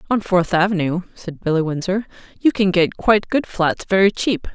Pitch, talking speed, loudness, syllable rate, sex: 185 Hz, 185 wpm, -19 LUFS, 5.1 syllables/s, female